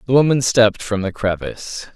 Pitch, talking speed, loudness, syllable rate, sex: 110 Hz, 185 wpm, -18 LUFS, 5.8 syllables/s, male